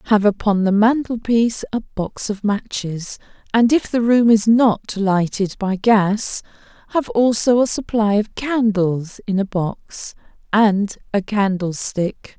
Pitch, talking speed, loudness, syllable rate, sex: 210 Hz, 145 wpm, -18 LUFS, 3.8 syllables/s, female